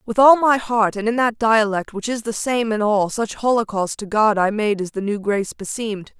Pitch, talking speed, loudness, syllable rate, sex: 215 Hz, 240 wpm, -19 LUFS, 5.1 syllables/s, female